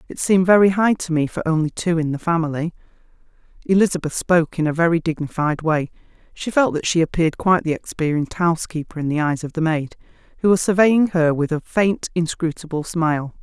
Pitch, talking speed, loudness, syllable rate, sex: 165 Hz, 190 wpm, -19 LUFS, 6.1 syllables/s, female